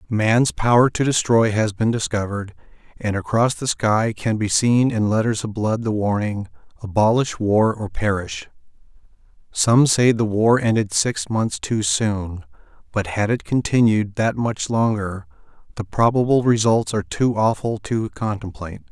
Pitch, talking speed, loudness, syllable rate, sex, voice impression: 110 Hz, 150 wpm, -20 LUFS, 4.5 syllables/s, male, very masculine, very adult-like, thick, slightly muffled, cool, slightly intellectual, calm, slightly mature, elegant